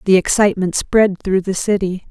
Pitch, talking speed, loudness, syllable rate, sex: 195 Hz, 170 wpm, -16 LUFS, 5.3 syllables/s, female